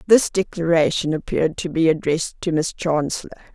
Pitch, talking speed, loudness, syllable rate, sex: 165 Hz, 150 wpm, -20 LUFS, 5.7 syllables/s, female